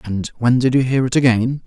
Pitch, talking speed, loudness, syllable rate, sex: 125 Hz, 255 wpm, -17 LUFS, 5.4 syllables/s, male